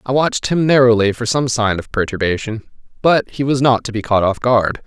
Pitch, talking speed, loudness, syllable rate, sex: 120 Hz, 220 wpm, -16 LUFS, 5.5 syllables/s, male